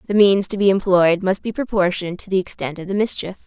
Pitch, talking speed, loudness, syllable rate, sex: 190 Hz, 245 wpm, -19 LUFS, 6.1 syllables/s, female